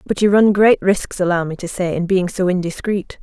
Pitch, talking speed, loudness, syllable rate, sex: 185 Hz, 240 wpm, -17 LUFS, 5.1 syllables/s, female